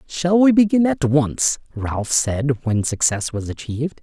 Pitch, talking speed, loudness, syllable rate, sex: 145 Hz, 165 wpm, -19 LUFS, 4.0 syllables/s, male